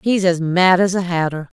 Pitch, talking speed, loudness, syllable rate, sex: 180 Hz, 225 wpm, -16 LUFS, 4.7 syllables/s, female